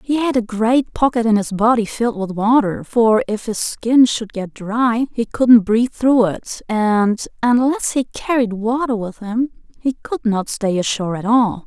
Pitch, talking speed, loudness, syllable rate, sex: 230 Hz, 190 wpm, -17 LUFS, 4.2 syllables/s, female